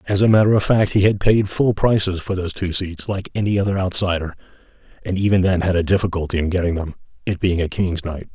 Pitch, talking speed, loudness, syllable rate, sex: 95 Hz, 230 wpm, -19 LUFS, 6.2 syllables/s, male